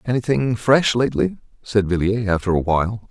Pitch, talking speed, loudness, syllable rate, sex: 110 Hz, 155 wpm, -19 LUFS, 5.5 syllables/s, male